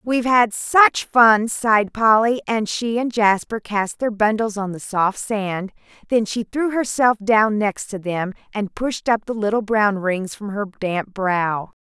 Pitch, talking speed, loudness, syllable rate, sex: 215 Hz, 185 wpm, -19 LUFS, 4.0 syllables/s, female